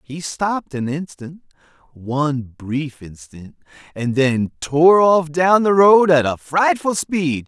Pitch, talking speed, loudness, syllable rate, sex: 155 Hz, 145 wpm, -17 LUFS, 3.6 syllables/s, male